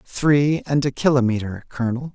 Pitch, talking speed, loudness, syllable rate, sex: 130 Hz, 140 wpm, -20 LUFS, 5.0 syllables/s, male